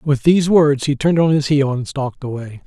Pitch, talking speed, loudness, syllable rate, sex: 140 Hz, 245 wpm, -16 LUFS, 5.8 syllables/s, male